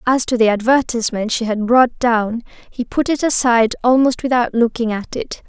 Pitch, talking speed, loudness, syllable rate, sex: 240 Hz, 185 wpm, -16 LUFS, 5.3 syllables/s, female